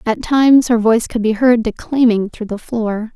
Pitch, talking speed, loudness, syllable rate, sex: 230 Hz, 210 wpm, -15 LUFS, 5.0 syllables/s, female